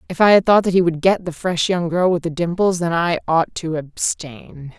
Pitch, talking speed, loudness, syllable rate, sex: 170 Hz, 240 wpm, -18 LUFS, 4.7 syllables/s, female